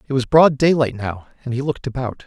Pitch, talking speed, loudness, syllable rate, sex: 130 Hz, 240 wpm, -18 LUFS, 6.1 syllables/s, male